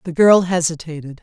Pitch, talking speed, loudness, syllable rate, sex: 170 Hz, 145 wpm, -15 LUFS, 5.4 syllables/s, female